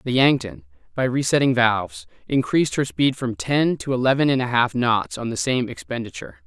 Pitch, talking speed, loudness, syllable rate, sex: 130 Hz, 185 wpm, -21 LUFS, 5.5 syllables/s, male